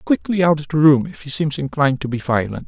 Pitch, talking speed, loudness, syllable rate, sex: 150 Hz, 290 wpm, -18 LUFS, 6.6 syllables/s, male